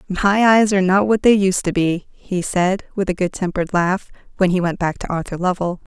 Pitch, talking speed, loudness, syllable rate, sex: 185 Hz, 230 wpm, -18 LUFS, 5.7 syllables/s, female